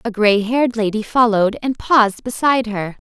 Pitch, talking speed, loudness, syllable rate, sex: 225 Hz, 175 wpm, -17 LUFS, 5.5 syllables/s, female